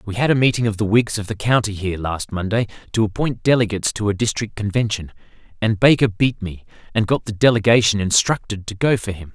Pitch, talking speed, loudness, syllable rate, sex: 105 Hz, 210 wpm, -19 LUFS, 6.1 syllables/s, male